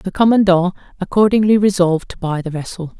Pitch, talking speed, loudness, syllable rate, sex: 185 Hz, 160 wpm, -15 LUFS, 5.9 syllables/s, female